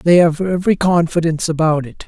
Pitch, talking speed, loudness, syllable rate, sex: 165 Hz, 145 wpm, -16 LUFS, 5.9 syllables/s, male